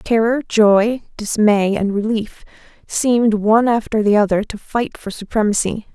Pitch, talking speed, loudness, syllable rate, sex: 215 Hz, 140 wpm, -17 LUFS, 4.6 syllables/s, female